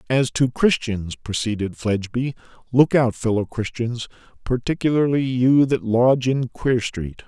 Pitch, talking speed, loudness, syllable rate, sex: 125 Hz, 130 wpm, -21 LUFS, 4.4 syllables/s, male